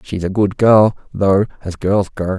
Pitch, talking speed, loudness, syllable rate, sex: 100 Hz, 200 wpm, -16 LUFS, 4.1 syllables/s, male